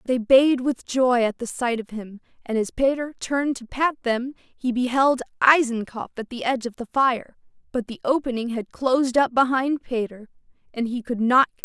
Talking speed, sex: 200 wpm, female